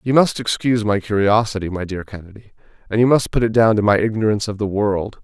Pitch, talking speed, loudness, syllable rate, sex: 105 Hz, 230 wpm, -18 LUFS, 6.3 syllables/s, male